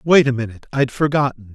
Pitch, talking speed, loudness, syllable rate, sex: 130 Hz, 195 wpm, -19 LUFS, 6.2 syllables/s, male